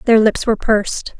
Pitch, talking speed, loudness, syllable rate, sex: 220 Hz, 200 wpm, -16 LUFS, 5.8 syllables/s, female